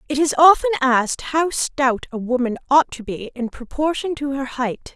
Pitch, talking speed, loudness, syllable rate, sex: 270 Hz, 195 wpm, -19 LUFS, 4.7 syllables/s, female